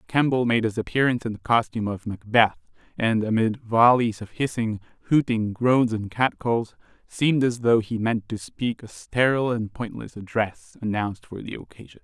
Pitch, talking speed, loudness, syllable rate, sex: 115 Hz, 175 wpm, -23 LUFS, 5.0 syllables/s, male